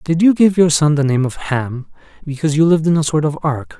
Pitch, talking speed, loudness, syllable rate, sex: 155 Hz, 270 wpm, -15 LUFS, 6.1 syllables/s, male